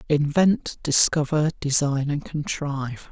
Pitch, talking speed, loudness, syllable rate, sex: 145 Hz, 95 wpm, -22 LUFS, 3.9 syllables/s, male